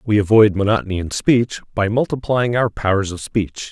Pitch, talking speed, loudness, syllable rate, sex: 105 Hz, 180 wpm, -18 LUFS, 5.2 syllables/s, male